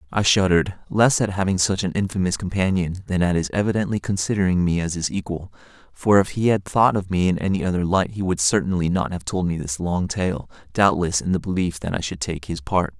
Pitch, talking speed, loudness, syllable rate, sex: 90 Hz, 225 wpm, -21 LUFS, 5.8 syllables/s, male